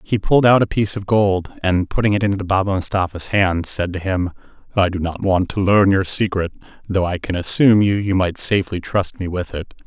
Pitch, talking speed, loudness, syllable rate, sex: 95 Hz, 225 wpm, -18 LUFS, 5.6 syllables/s, male